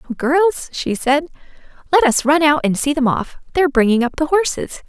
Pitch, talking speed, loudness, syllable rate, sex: 290 Hz, 210 wpm, -17 LUFS, 5.1 syllables/s, female